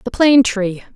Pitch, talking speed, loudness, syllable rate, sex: 230 Hz, 190 wpm, -14 LUFS, 5.4 syllables/s, female